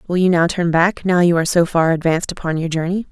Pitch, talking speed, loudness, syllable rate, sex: 170 Hz, 270 wpm, -17 LUFS, 6.5 syllables/s, female